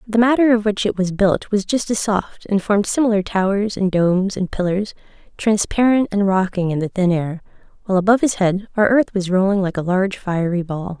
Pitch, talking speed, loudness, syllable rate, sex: 195 Hz, 215 wpm, -18 LUFS, 5.6 syllables/s, female